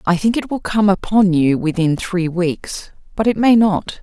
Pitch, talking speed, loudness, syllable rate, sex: 190 Hz, 210 wpm, -16 LUFS, 4.4 syllables/s, female